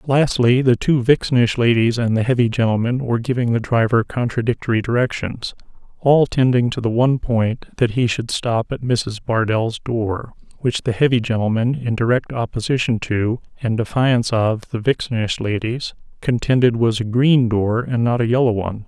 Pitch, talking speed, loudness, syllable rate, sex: 120 Hz, 170 wpm, -18 LUFS, 5.1 syllables/s, male